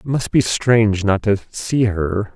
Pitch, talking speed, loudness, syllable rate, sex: 105 Hz, 180 wpm, -18 LUFS, 3.7 syllables/s, male